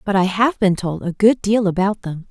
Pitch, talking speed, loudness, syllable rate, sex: 200 Hz, 260 wpm, -18 LUFS, 5.0 syllables/s, female